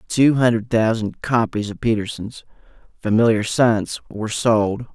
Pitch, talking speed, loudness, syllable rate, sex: 115 Hz, 120 wpm, -19 LUFS, 4.6 syllables/s, male